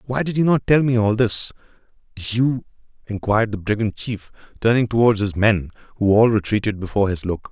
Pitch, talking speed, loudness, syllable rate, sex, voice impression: 110 Hz, 175 wpm, -19 LUFS, 5.6 syllables/s, male, masculine, adult-like, slightly thick, tensed, powerful, slightly soft, slightly raspy, cool, intellectual, calm, friendly, reassuring, wild, lively, kind